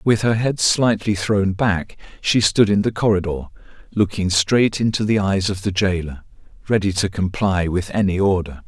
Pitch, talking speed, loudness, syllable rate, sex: 100 Hz, 175 wpm, -19 LUFS, 4.7 syllables/s, male